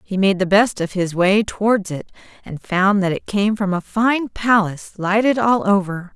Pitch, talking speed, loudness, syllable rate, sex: 200 Hz, 205 wpm, -18 LUFS, 4.6 syllables/s, female